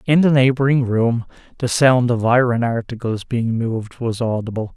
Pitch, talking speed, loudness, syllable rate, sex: 120 Hz, 165 wpm, -18 LUFS, 4.9 syllables/s, male